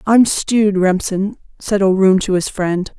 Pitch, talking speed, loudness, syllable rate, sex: 200 Hz, 160 wpm, -15 LUFS, 4.2 syllables/s, female